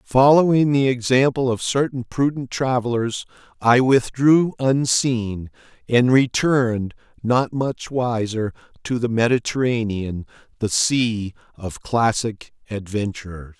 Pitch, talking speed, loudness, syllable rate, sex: 120 Hz, 95 wpm, -20 LUFS, 3.9 syllables/s, male